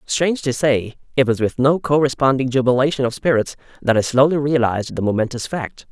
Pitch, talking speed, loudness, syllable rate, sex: 130 Hz, 185 wpm, -18 LUFS, 5.8 syllables/s, male